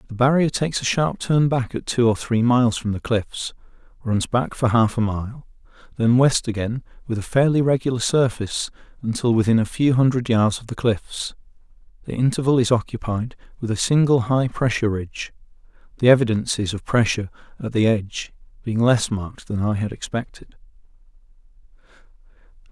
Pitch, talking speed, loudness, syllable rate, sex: 120 Hz, 160 wpm, -21 LUFS, 5.5 syllables/s, male